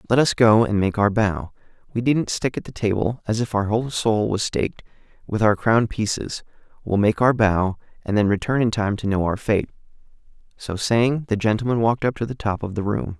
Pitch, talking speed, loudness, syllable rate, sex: 110 Hz, 220 wpm, -21 LUFS, 5.5 syllables/s, male